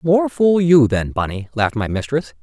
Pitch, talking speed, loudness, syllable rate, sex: 135 Hz, 200 wpm, -17 LUFS, 4.9 syllables/s, male